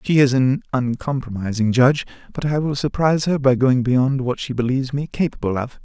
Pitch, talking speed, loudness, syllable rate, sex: 130 Hz, 195 wpm, -19 LUFS, 5.6 syllables/s, male